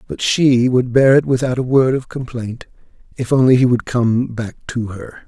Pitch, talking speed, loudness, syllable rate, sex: 125 Hz, 205 wpm, -16 LUFS, 4.6 syllables/s, male